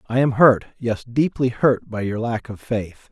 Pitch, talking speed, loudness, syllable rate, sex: 115 Hz, 175 wpm, -20 LUFS, 4.3 syllables/s, male